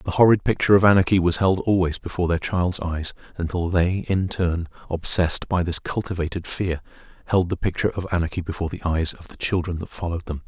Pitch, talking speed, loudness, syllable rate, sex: 90 Hz, 200 wpm, -22 LUFS, 6.2 syllables/s, male